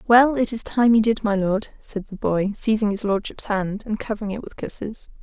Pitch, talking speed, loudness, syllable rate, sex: 210 Hz, 230 wpm, -22 LUFS, 5.2 syllables/s, female